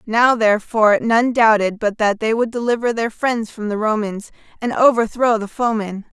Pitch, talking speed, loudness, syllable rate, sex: 225 Hz, 175 wpm, -17 LUFS, 4.9 syllables/s, female